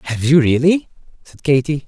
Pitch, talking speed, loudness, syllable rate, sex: 145 Hz, 160 wpm, -16 LUFS, 5.2 syllables/s, male